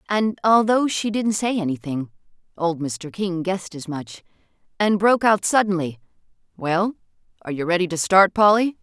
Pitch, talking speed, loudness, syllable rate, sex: 185 Hz, 155 wpm, -21 LUFS, 5.1 syllables/s, female